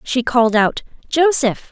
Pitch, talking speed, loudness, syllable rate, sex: 255 Hz, 140 wpm, -16 LUFS, 4.4 syllables/s, female